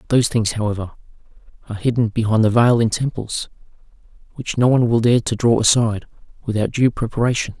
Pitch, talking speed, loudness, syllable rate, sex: 115 Hz, 165 wpm, -18 LUFS, 6.5 syllables/s, male